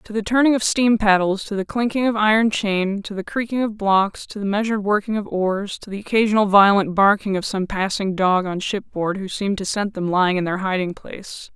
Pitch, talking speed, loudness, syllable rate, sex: 200 Hz, 230 wpm, -20 LUFS, 5.5 syllables/s, female